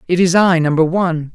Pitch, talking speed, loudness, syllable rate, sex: 170 Hz, 225 wpm, -14 LUFS, 5.9 syllables/s, female